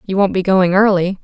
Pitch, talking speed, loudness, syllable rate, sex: 190 Hz, 245 wpm, -14 LUFS, 5.3 syllables/s, female